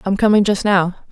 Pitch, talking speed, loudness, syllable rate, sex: 195 Hz, 215 wpm, -15 LUFS, 5.8 syllables/s, female